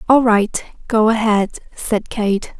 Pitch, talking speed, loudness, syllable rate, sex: 220 Hz, 140 wpm, -17 LUFS, 3.5 syllables/s, female